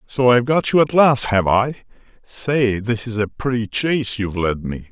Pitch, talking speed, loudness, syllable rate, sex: 120 Hz, 210 wpm, -18 LUFS, 5.0 syllables/s, male